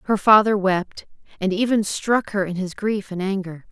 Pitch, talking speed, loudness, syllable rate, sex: 200 Hz, 195 wpm, -20 LUFS, 4.7 syllables/s, female